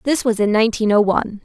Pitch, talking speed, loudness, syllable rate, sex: 220 Hz, 250 wpm, -17 LUFS, 6.9 syllables/s, female